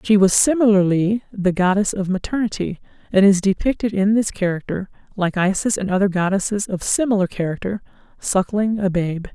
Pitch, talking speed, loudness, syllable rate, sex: 195 Hz, 155 wpm, -19 LUFS, 5.4 syllables/s, female